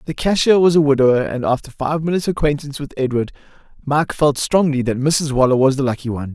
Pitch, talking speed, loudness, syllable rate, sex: 140 Hz, 210 wpm, -17 LUFS, 6.4 syllables/s, male